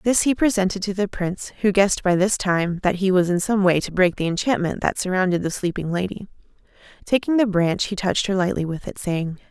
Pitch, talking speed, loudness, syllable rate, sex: 190 Hz, 225 wpm, -21 LUFS, 5.9 syllables/s, female